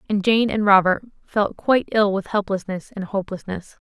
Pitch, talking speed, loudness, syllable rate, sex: 200 Hz, 170 wpm, -21 LUFS, 5.4 syllables/s, female